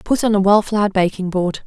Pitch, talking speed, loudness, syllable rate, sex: 200 Hz, 255 wpm, -17 LUFS, 5.7 syllables/s, female